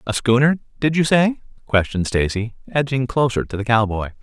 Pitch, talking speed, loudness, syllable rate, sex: 125 Hz, 170 wpm, -19 LUFS, 5.5 syllables/s, male